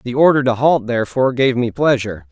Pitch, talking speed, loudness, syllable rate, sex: 125 Hz, 205 wpm, -16 LUFS, 6.2 syllables/s, male